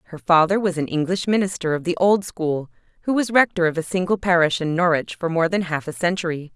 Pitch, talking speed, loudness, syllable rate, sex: 175 Hz, 230 wpm, -20 LUFS, 5.9 syllables/s, female